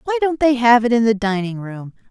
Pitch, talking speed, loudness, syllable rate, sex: 235 Hz, 255 wpm, -16 LUFS, 5.5 syllables/s, female